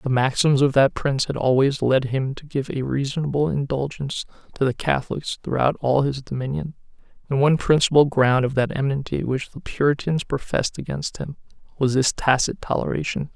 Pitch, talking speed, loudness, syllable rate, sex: 140 Hz, 170 wpm, -22 LUFS, 5.6 syllables/s, male